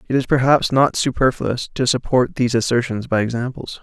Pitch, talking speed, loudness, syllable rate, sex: 125 Hz, 175 wpm, -18 LUFS, 5.5 syllables/s, male